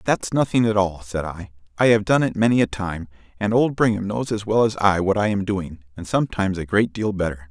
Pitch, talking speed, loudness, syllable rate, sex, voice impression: 100 Hz, 250 wpm, -21 LUFS, 5.7 syllables/s, male, masculine, very adult-like, very middle-aged, very thick, tensed, powerful, slightly hard, clear, fluent, slightly raspy, very cool, intellectual, very refreshing, sincere, very calm, very mature, friendly, reassuring, unique, elegant, very wild, sweet, very lively, kind, slightly intense